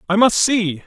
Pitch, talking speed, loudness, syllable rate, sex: 205 Hz, 210 wpm, -16 LUFS, 4.6 syllables/s, male